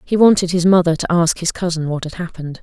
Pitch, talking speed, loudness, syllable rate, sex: 170 Hz, 250 wpm, -16 LUFS, 6.5 syllables/s, female